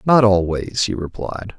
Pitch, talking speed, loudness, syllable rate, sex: 100 Hz, 150 wpm, -19 LUFS, 4.3 syllables/s, male